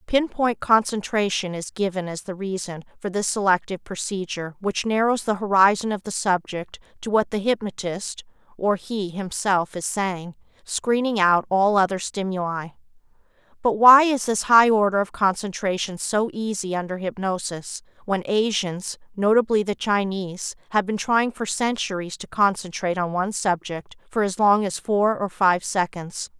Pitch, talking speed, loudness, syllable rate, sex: 200 Hz, 155 wpm, -22 LUFS, 4.7 syllables/s, female